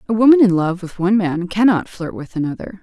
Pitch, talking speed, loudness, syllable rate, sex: 190 Hz, 235 wpm, -16 LUFS, 6.0 syllables/s, female